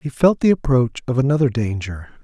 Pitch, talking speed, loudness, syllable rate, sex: 130 Hz, 190 wpm, -18 LUFS, 5.4 syllables/s, male